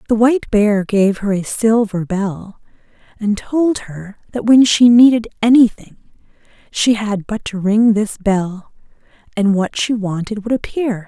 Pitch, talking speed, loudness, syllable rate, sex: 215 Hz, 155 wpm, -15 LUFS, 4.2 syllables/s, female